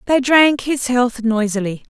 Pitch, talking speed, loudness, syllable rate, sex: 245 Hz, 155 wpm, -16 LUFS, 4.1 syllables/s, female